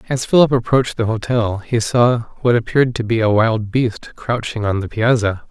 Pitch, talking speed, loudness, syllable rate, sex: 115 Hz, 195 wpm, -17 LUFS, 4.9 syllables/s, male